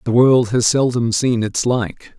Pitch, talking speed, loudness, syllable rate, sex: 120 Hz, 190 wpm, -16 LUFS, 3.9 syllables/s, male